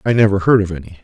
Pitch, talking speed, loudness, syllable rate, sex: 100 Hz, 290 wpm, -15 LUFS, 7.8 syllables/s, male